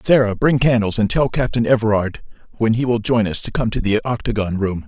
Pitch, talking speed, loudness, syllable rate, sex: 110 Hz, 220 wpm, -18 LUFS, 5.7 syllables/s, male